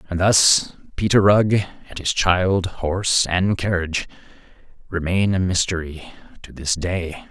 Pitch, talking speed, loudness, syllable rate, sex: 90 Hz, 130 wpm, -19 LUFS, 4.1 syllables/s, male